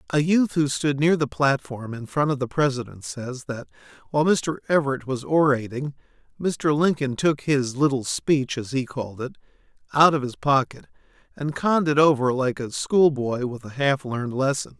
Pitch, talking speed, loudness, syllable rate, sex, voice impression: 140 Hz, 180 wpm, -23 LUFS, 5.0 syllables/s, male, masculine, adult-like, slightly bright, slightly refreshing, sincere